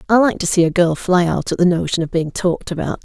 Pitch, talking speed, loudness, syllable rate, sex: 175 Hz, 295 wpm, -17 LUFS, 6.2 syllables/s, female